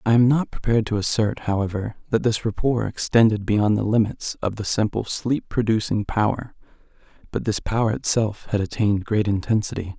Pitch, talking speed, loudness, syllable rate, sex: 110 Hz, 170 wpm, -22 LUFS, 5.4 syllables/s, male